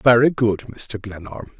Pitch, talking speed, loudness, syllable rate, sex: 110 Hz, 150 wpm, -20 LUFS, 4.0 syllables/s, male